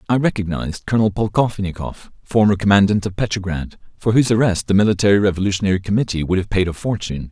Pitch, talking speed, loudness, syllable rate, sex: 100 Hz, 165 wpm, -18 LUFS, 7.0 syllables/s, male